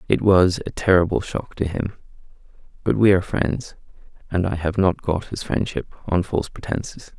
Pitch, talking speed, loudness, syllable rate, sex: 90 Hz, 175 wpm, -21 LUFS, 5.3 syllables/s, male